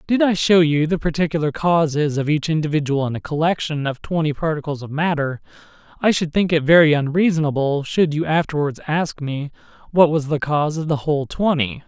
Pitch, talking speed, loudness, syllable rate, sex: 155 Hz, 185 wpm, -19 LUFS, 5.6 syllables/s, male